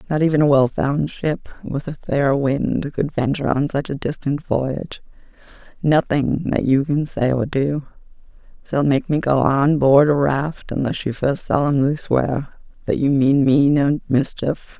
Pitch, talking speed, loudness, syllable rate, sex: 140 Hz, 175 wpm, -19 LUFS, 4.3 syllables/s, female